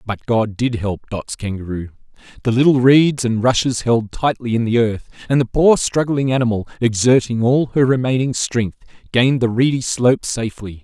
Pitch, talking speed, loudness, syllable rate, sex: 120 Hz, 170 wpm, -17 LUFS, 5.2 syllables/s, male